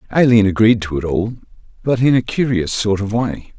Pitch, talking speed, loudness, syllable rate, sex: 110 Hz, 200 wpm, -16 LUFS, 5.4 syllables/s, male